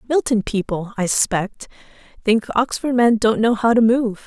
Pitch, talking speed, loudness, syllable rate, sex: 225 Hz, 170 wpm, -18 LUFS, 4.6 syllables/s, female